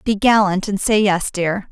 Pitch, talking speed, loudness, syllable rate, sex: 200 Hz, 210 wpm, -17 LUFS, 4.4 syllables/s, female